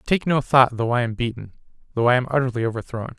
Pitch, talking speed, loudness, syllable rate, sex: 125 Hz, 225 wpm, -21 LUFS, 6.6 syllables/s, male